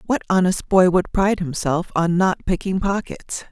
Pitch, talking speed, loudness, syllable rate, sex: 185 Hz, 170 wpm, -20 LUFS, 4.7 syllables/s, female